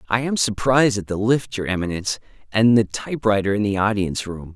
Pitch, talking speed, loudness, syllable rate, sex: 105 Hz, 200 wpm, -20 LUFS, 6.2 syllables/s, male